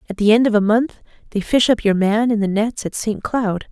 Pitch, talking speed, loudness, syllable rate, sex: 215 Hz, 275 wpm, -18 LUFS, 5.4 syllables/s, female